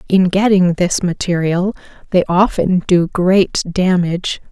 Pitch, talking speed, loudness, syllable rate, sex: 180 Hz, 120 wpm, -15 LUFS, 3.9 syllables/s, female